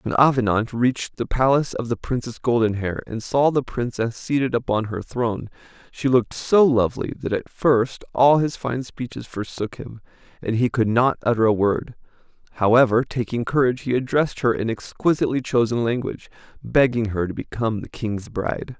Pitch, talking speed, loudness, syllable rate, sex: 120 Hz, 170 wpm, -22 LUFS, 5.4 syllables/s, male